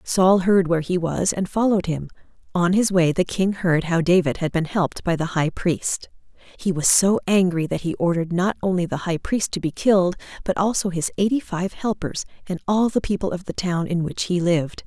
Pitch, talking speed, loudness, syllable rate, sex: 180 Hz, 220 wpm, -21 LUFS, 5.3 syllables/s, female